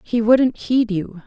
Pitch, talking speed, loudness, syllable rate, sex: 225 Hz, 190 wpm, -18 LUFS, 3.5 syllables/s, female